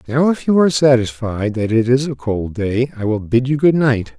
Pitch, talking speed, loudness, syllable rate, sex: 125 Hz, 245 wpm, -16 LUFS, 5.0 syllables/s, male